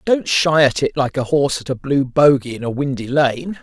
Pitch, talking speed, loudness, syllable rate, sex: 140 Hz, 250 wpm, -17 LUFS, 5.1 syllables/s, male